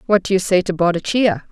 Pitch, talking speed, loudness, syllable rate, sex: 190 Hz, 235 wpm, -17 LUFS, 5.9 syllables/s, female